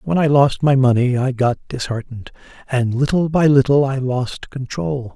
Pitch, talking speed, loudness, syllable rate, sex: 130 Hz, 175 wpm, -17 LUFS, 4.8 syllables/s, male